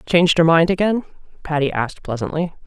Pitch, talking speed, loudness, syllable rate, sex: 165 Hz, 160 wpm, -18 LUFS, 6.2 syllables/s, female